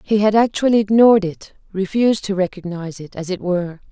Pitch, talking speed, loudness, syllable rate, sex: 200 Hz, 185 wpm, -17 LUFS, 6.2 syllables/s, female